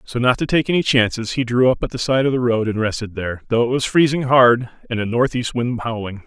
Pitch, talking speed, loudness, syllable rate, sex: 120 Hz, 270 wpm, -18 LUFS, 6.0 syllables/s, male